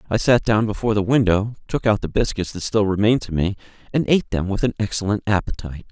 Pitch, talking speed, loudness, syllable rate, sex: 105 Hz, 225 wpm, -20 LUFS, 6.6 syllables/s, male